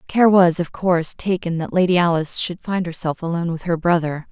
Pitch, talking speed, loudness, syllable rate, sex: 170 Hz, 210 wpm, -19 LUFS, 5.8 syllables/s, female